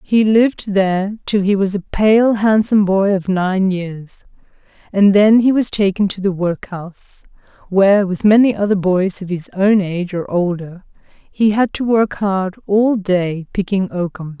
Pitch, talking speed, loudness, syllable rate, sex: 195 Hz, 170 wpm, -15 LUFS, 4.5 syllables/s, female